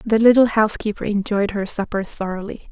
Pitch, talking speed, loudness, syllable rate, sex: 210 Hz, 155 wpm, -19 LUFS, 5.8 syllables/s, female